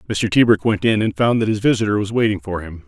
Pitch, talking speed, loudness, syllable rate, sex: 105 Hz, 270 wpm, -18 LUFS, 6.3 syllables/s, male